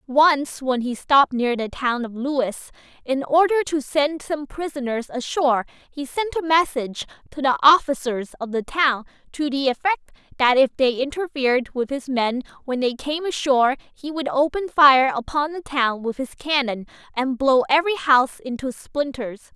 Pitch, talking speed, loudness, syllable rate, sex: 270 Hz, 170 wpm, -21 LUFS, 4.9 syllables/s, female